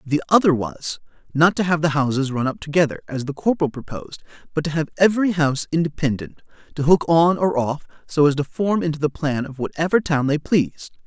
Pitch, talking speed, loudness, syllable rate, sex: 150 Hz, 205 wpm, -20 LUFS, 5.9 syllables/s, male